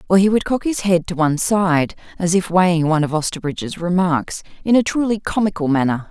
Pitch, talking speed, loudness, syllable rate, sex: 180 Hz, 205 wpm, -18 LUFS, 5.8 syllables/s, female